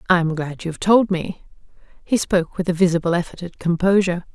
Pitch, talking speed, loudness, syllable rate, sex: 180 Hz, 180 wpm, -20 LUFS, 6.0 syllables/s, female